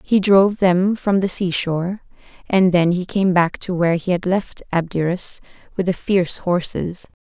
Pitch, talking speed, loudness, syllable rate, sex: 185 Hz, 175 wpm, -19 LUFS, 4.7 syllables/s, female